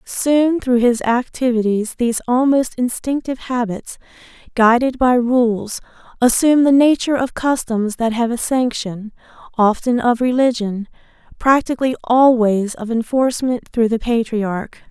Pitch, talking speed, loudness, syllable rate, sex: 240 Hz, 120 wpm, -17 LUFS, 4.5 syllables/s, female